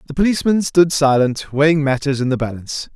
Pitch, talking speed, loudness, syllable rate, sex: 145 Hz, 185 wpm, -17 LUFS, 6.2 syllables/s, male